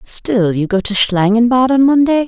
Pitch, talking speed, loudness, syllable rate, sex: 230 Hz, 185 wpm, -13 LUFS, 4.5 syllables/s, female